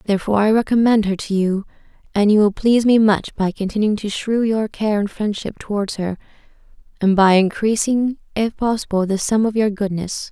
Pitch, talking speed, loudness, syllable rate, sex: 210 Hz, 185 wpm, -18 LUFS, 5.5 syllables/s, female